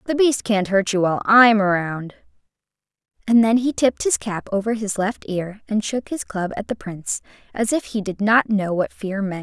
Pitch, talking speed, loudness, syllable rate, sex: 210 Hz, 215 wpm, -20 LUFS, 5.0 syllables/s, female